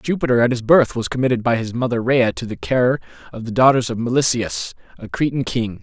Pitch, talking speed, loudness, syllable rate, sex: 125 Hz, 215 wpm, -18 LUFS, 5.8 syllables/s, male